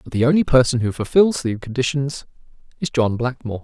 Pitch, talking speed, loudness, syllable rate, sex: 125 Hz, 180 wpm, -19 LUFS, 6.0 syllables/s, male